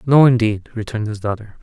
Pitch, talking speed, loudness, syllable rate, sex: 110 Hz, 185 wpm, -18 LUFS, 6.3 syllables/s, male